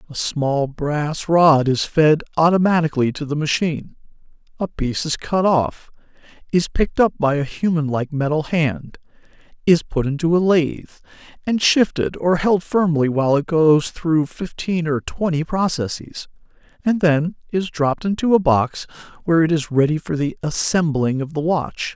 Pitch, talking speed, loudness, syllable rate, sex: 160 Hz, 160 wpm, -19 LUFS, 4.7 syllables/s, male